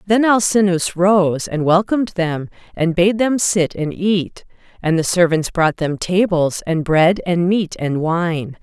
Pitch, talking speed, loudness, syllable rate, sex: 175 Hz, 165 wpm, -17 LUFS, 3.8 syllables/s, female